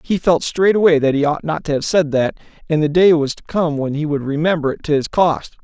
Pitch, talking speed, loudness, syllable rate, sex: 155 Hz, 265 wpm, -17 LUFS, 5.5 syllables/s, male